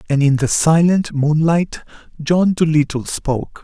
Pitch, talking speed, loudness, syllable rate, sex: 155 Hz, 130 wpm, -16 LUFS, 4.2 syllables/s, male